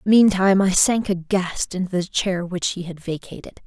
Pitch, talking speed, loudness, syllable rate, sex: 185 Hz, 180 wpm, -20 LUFS, 4.8 syllables/s, female